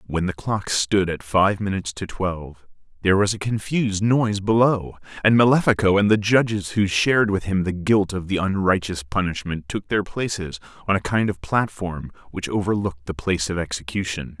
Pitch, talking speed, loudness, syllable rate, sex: 100 Hz, 185 wpm, -21 LUFS, 5.4 syllables/s, male